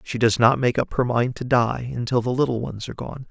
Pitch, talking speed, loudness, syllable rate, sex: 120 Hz, 270 wpm, -22 LUFS, 5.7 syllables/s, male